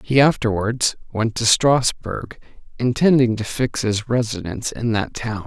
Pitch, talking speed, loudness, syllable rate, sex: 115 Hz, 145 wpm, -20 LUFS, 4.4 syllables/s, male